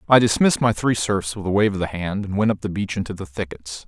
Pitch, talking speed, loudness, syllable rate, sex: 100 Hz, 295 wpm, -21 LUFS, 6.2 syllables/s, male